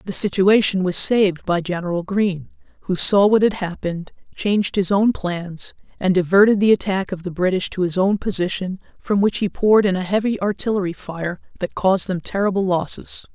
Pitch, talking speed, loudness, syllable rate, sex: 190 Hz, 185 wpm, -19 LUFS, 5.4 syllables/s, female